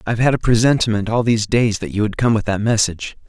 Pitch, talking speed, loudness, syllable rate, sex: 110 Hz, 255 wpm, -17 LUFS, 6.8 syllables/s, male